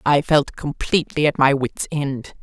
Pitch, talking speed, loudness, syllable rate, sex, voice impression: 140 Hz, 175 wpm, -20 LUFS, 4.4 syllables/s, female, slightly feminine, very gender-neutral, adult-like, middle-aged, very tensed, powerful, very bright, soft, very clear, very fluent, slightly cool, very intellectual, refreshing, sincere, slightly calm, very friendly, very reassuring, very unique, very elegant, very lively, kind, intense, slightly light